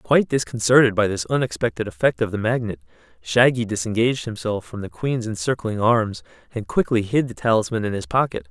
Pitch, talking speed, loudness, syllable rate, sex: 110 Hz, 175 wpm, -21 LUFS, 5.8 syllables/s, male